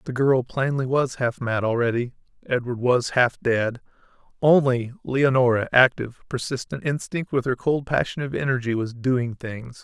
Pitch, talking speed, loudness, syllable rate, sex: 125 Hz, 155 wpm, -23 LUFS, 4.7 syllables/s, male